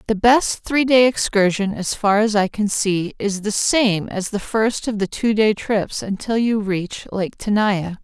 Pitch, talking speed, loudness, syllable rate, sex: 210 Hz, 200 wpm, -19 LUFS, 4.0 syllables/s, female